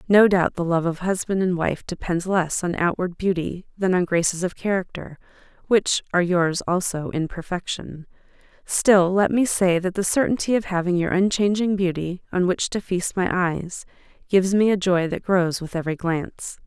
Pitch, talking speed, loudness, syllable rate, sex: 180 Hz, 185 wpm, -22 LUFS, 4.9 syllables/s, female